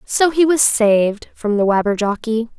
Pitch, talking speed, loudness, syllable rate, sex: 230 Hz, 160 wpm, -16 LUFS, 4.6 syllables/s, female